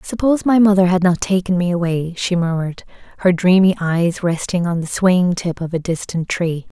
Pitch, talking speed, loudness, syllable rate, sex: 180 Hz, 195 wpm, -17 LUFS, 5.2 syllables/s, female